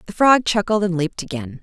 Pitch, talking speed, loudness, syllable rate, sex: 185 Hz, 220 wpm, -18 LUFS, 6.1 syllables/s, female